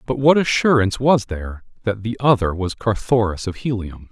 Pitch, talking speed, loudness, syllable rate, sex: 110 Hz, 175 wpm, -19 LUFS, 5.4 syllables/s, male